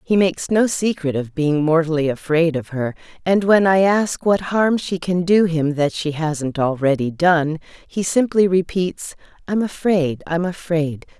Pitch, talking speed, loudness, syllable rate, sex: 170 Hz, 170 wpm, -19 LUFS, 4.2 syllables/s, female